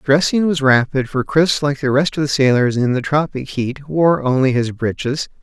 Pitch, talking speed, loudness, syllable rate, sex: 140 Hz, 210 wpm, -17 LUFS, 4.8 syllables/s, male